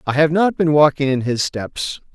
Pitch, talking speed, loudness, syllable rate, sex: 145 Hz, 225 wpm, -17 LUFS, 4.7 syllables/s, male